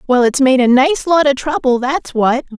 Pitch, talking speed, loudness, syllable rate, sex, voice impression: 265 Hz, 230 wpm, -13 LUFS, 4.8 syllables/s, female, very feminine, very adult-like, very middle-aged, thin, slightly tensed, slightly weak, dark, slightly soft, slightly clear, fluent, slightly cute, very intellectual, slightly refreshing, sincere, very calm, slightly friendly, slightly reassuring, unique, very elegant, sweet, slightly lively, kind, modest